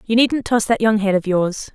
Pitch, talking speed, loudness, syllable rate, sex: 215 Hz, 275 wpm, -18 LUFS, 4.9 syllables/s, female